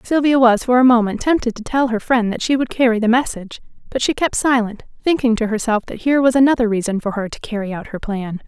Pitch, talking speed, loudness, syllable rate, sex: 235 Hz, 250 wpm, -17 LUFS, 6.2 syllables/s, female